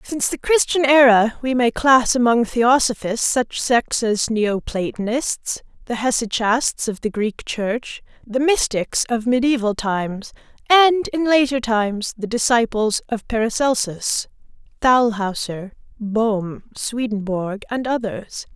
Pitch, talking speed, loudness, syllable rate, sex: 235 Hz, 125 wpm, -19 LUFS, 4.0 syllables/s, female